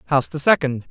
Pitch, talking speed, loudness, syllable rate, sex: 145 Hz, 200 wpm, -19 LUFS, 6.0 syllables/s, male